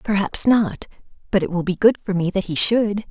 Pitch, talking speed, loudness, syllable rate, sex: 195 Hz, 230 wpm, -19 LUFS, 5.4 syllables/s, female